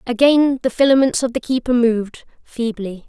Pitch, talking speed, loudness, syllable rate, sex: 245 Hz, 135 wpm, -17 LUFS, 5.1 syllables/s, female